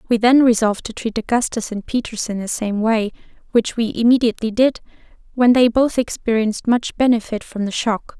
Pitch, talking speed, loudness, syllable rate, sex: 230 Hz, 185 wpm, -18 LUFS, 5.5 syllables/s, female